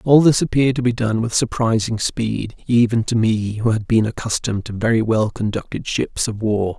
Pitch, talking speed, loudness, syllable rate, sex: 115 Hz, 205 wpm, -19 LUFS, 5.2 syllables/s, male